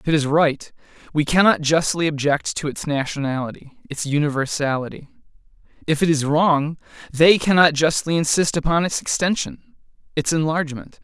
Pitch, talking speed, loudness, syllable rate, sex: 155 Hz, 135 wpm, -19 LUFS, 5.2 syllables/s, male